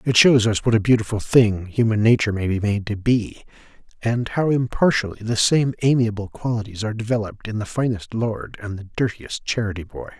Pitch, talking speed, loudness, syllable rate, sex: 110 Hz, 190 wpm, -21 LUFS, 5.6 syllables/s, male